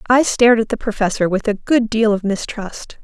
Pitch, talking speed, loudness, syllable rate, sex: 220 Hz, 220 wpm, -17 LUFS, 5.3 syllables/s, female